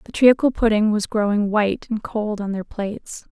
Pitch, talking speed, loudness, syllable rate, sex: 215 Hz, 195 wpm, -20 LUFS, 5.1 syllables/s, female